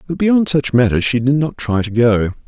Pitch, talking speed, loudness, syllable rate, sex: 130 Hz, 245 wpm, -15 LUFS, 4.9 syllables/s, male